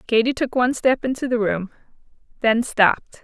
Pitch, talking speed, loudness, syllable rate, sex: 240 Hz, 150 wpm, -20 LUFS, 5.5 syllables/s, female